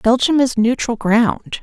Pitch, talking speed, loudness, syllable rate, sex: 240 Hz, 150 wpm, -16 LUFS, 3.8 syllables/s, female